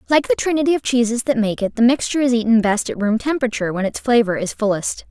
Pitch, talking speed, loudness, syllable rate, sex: 235 Hz, 245 wpm, -18 LUFS, 6.8 syllables/s, female